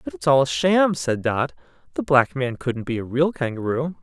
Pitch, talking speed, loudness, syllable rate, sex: 135 Hz, 210 wpm, -21 LUFS, 4.6 syllables/s, male